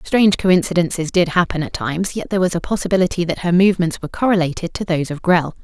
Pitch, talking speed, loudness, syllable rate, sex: 175 Hz, 215 wpm, -18 LUFS, 6.9 syllables/s, female